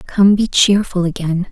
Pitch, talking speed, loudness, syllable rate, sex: 190 Hz, 160 wpm, -14 LUFS, 4.4 syllables/s, female